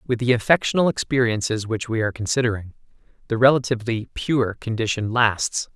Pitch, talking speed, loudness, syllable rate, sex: 115 Hz, 135 wpm, -21 LUFS, 5.7 syllables/s, male